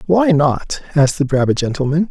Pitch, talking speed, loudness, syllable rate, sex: 155 Hz, 170 wpm, -16 LUFS, 5.5 syllables/s, male